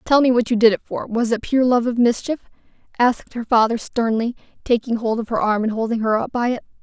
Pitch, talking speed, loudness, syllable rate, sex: 235 Hz, 245 wpm, -19 LUFS, 6.0 syllables/s, female